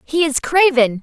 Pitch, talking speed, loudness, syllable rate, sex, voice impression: 290 Hz, 175 wpm, -15 LUFS, 4.3 syllables/s, female, very feminine, very young, very thin, very tensed, powerful, very bright, hard, very clear, very fluent, very cute, slightly cool, intellectual, very refreshing, sincere, slightly calm, very friendly, very reassuring, very unique, elegant, wild, sweet, very lively, strict, intense, sharp, slightly light